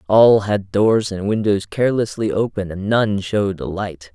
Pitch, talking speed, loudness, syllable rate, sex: 100 Hz, 175 wpm, -18 LUFS, 4.6 syllables/s, male